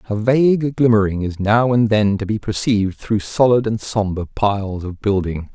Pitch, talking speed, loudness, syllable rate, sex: 105 Hz, 185 wpm, -18 LUFS, 4.9 syllables/s, male